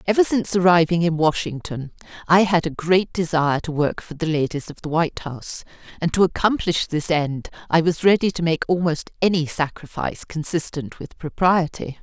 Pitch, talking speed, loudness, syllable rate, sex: 165 Hz, 175 wpm, -21 LUFS, 5.4 syllables/s, female